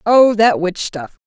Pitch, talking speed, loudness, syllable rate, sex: 200 Hz, 190 wpm, -15 LUFS, 3.7 syllables/s, female